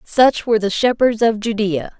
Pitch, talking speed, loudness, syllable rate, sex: 225 Hz, 180 wpm, -17 LUFS, 4.9 syllables/s, female